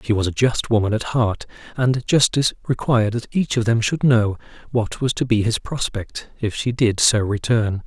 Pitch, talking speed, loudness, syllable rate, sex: 115 Hz, 205 wpm, -20 LUFS, 4.9 syllables/s, male